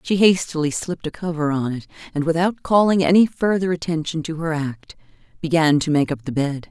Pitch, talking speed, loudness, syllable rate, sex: 160 Hz, 195 wpm, -20 LUFS, 5.6 syllables/s, female